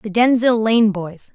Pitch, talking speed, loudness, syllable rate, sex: 215 Hz, 180 wpm, -16 LUFS, 4.6 syllables/s, female